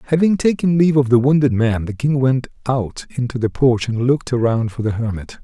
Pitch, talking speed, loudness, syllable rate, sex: 130 Hz, 220 wpm, -17 LUFS, 5.7 syllables/s, male